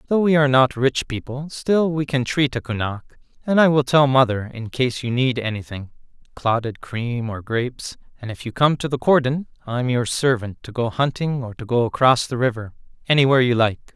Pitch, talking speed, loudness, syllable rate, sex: 130 Hz, 200 wpm, -20 LUFS, 5.4 syllables/s, male